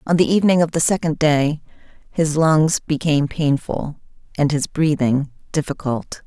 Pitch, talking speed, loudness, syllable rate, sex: 150 Hz, 145 wpm, -19 LUFS, 4.8 syllables/s, female